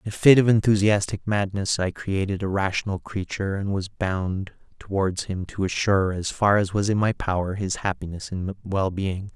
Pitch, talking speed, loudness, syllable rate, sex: 95 Hz, 185 wpm, -24 LUFS, 5.0 syllables/s, male